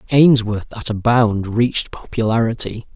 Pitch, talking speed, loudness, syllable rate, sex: 115 Hz, 120 wpm, -17 LUFS, 4.4 syllables/s, male